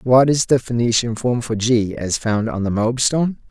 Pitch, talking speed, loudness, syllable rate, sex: 120 Hz, 225 wpm, -18 LUFS, 4.7 syllables/s, male